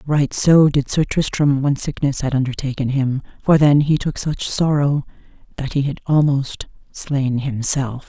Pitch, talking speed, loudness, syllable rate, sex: 140 Hz, 165 wpm, -18 LUFS, 4.3 syllables/s, female